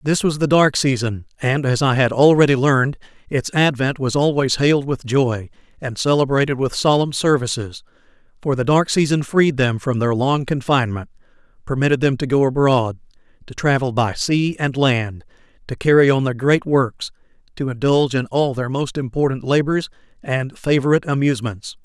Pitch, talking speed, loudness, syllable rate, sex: 135 Hz, 170 wpm, -18 LUFS, 5.2 syllables/s, male